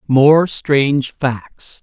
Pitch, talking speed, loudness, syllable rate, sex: 140 Hz, 100 wpm, -14 LUFS, 2.4 syllables/s, male